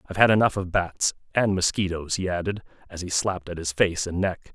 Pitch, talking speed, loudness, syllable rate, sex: 90 Hz, 210 wpm, -24 LUFS, 5.8 syllables/s, male